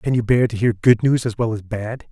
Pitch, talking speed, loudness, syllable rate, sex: 115 Hz, 310 wpm, -19 LUFS, 5.5 syllables/s, male